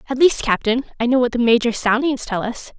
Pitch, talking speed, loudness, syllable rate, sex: 245 Hz, 235 wpm, -18 LUFS, 5.8 syllables/s, female